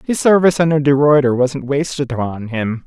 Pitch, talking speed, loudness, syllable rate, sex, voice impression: 140 Hz, 190 wpm, -15 LUFS, 5.1 syllables/s, male, masculine, adult-like, tensed, powerful, clear, nasal, intellectual, slightly calm, friendly, slightly wild, slightly lively, slightly modest